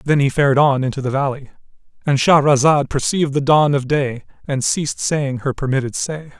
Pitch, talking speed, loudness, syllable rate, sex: 140 Hz, 180 wpm, -17 LUFS, 5.6 syllables/s, male